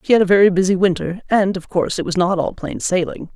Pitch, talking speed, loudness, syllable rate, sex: 185 Hz, 270 wpm, -17 LUFS, 6.4 syllables/s, female